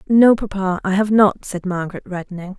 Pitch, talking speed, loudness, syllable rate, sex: 195 Hz, 185 wpm, -18 LUFS, 5.5 syllables/s, female